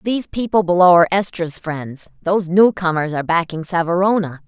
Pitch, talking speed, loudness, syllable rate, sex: 175 Hz, 150 wpm, -17 LUFS, 5.8 syllables/s, female